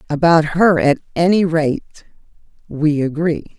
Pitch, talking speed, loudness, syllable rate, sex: 160 Hz, 115 wpm, -16 LUFS, 4.2 syllables/s, female